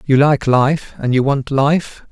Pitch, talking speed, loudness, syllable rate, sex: 140 Hz, 200 wpm, -15 LUFS, 3.6 syllables/s, male